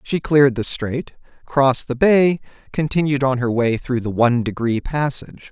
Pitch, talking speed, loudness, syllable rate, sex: 135 Hz, 175 wpm, -19 LUFS, 5.0 syllables/s, male